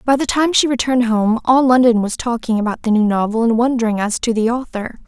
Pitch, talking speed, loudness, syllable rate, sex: 235 Hz, 235 wpm, -16 LUFS, 5.9 syllables/s, female